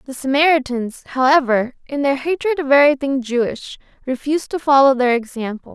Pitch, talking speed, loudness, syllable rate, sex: 270 Hz, 145 wpm, -17 LUFS, 5.7 syllables/s, female